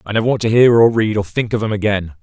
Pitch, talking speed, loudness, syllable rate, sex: 110 Hz, 325 wpm, -15 LUFS, 6.8 syllables/s, male